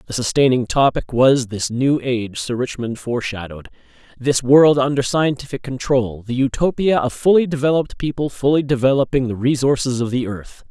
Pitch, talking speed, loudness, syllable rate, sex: 130 Hz, 165 wpm, -18 LUFS, 5.3 syllables/s, male